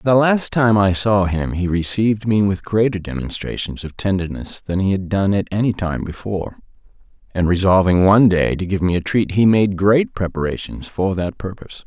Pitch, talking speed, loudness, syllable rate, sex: 95 Hz, 190 wpm, -18 LUFS, 5.1 syllables/s, male